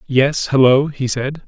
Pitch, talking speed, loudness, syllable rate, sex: 135 Hz, 120 wpm, -16 LUFS, 3.9 syllables/s, male